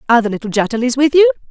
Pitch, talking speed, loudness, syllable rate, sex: 250 Hz, 240 wpm, -14 LUFS, 8.9 syllables/s, female